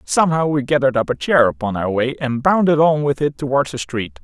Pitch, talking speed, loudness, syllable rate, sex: 135 Hz, 240 wpm, -17 LUFS, 5.8 syllables/s, male